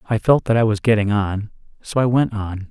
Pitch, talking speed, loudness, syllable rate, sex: 110 Hz, 220 wpm, -19 LUFS, 5.4 syllables/s, male